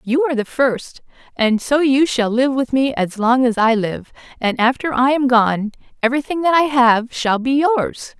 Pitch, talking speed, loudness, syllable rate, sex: 255 Hz, 205 wpm, -17 LUFS, 4.6 syllables/s, female